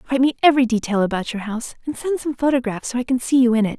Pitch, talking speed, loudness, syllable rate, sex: 250 Hz, 285 wpm, -20 LUFS, 7.7 syllables/s, female